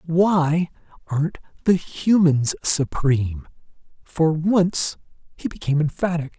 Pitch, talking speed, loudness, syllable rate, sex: 160 Hz, 95 wpm, -21 LUFS, 3.9 syllables/s, male